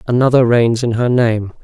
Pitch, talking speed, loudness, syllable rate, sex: 120 Hz, 185 wpm, -14 LUFS, 4.9 syllables/s, male